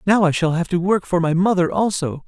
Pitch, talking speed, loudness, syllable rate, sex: 180 Hz, 265 wpm, -19 LUFS, 5.6 syllables/s, male